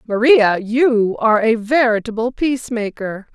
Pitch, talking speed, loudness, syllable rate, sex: 230 Hz, 125 wpm, -16 LUFS, 4.4 syllables/s, female